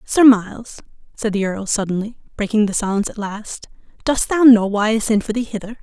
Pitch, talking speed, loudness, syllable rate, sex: 215 Hz, 205 wpm, -17 LUFS, 5.6 syllables/s, female